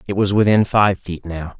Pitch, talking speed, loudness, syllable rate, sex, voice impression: 95 Hz, 225 wpm, -17 LUFS, 4.9 syllables/s, male, masculine, adult-like, tensed, powerful, bright, clear, fluent, intellectual, friendly, unique, lively